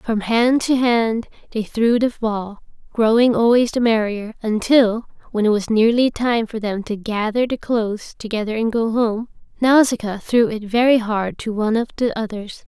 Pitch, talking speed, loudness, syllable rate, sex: 225 Hz, 180 wpm, -19 LUFS, 4.7 syllables/s, female